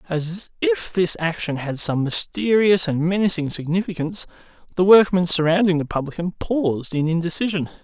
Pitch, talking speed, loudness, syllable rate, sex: 170 Hz, 140 wpm, -20 LUFS, 5.2 syllables/s, male